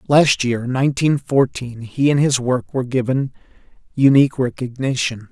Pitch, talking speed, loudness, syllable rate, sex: 130 Hz, 135 wpm, -18 LUFS, 4.9 syllables/s, male